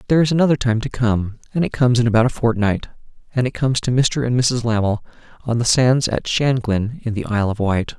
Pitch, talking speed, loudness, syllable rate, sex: 120 Hz, 240 wpm, -19 LUFS, 6.2 syllables/s, male